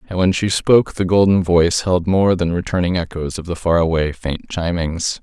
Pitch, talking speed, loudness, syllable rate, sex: 90 Hz, 205 wpm, -17 LUFS, 5.2 syllables/s, male